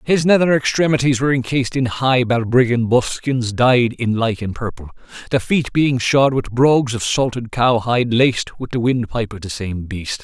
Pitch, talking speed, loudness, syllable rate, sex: 125 Hz, 175 wpm, -17 LUFS, 5.0 syllables/s, male